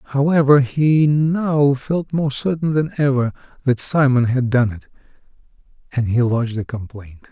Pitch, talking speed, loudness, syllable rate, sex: 135 Hz, 150 wpm, -18 LUFS, 4.6 syllables/s, male